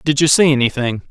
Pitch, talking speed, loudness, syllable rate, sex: 140 Hz, 220 wpm, -14 LUFS, 6.3 syllables/s, male